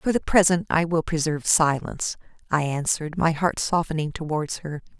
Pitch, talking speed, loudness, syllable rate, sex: 160 Hz, 170 wpm, -23 LUFS, 5.4 syllables/s, female